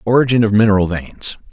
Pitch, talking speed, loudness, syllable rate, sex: 110 Hz, 160 wpm, -15 LUFS, 6.2 syllables/s, male